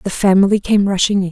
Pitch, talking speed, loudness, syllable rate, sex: 195 Hz, 230 wpm, -14 LUFS, 6.4 syllables/s, female